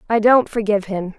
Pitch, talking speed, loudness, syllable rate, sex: 210 Hz, 200 wpm, -17 LUFS, 6.0 syllables/s, female